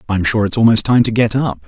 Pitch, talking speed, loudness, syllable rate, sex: 110 Hz, 285 wpm, -14 LUFS, 6.2 syllables/s, male